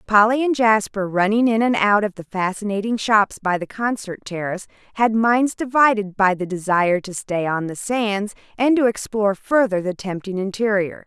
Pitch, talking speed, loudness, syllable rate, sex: 210 Hz, 180 wpm, -20 LUFS, 5.0 syllables/s, female